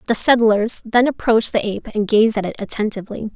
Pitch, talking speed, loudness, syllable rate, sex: 220 Hz, 195 wpm, -17 LUFS, 6.1 syllables/s, female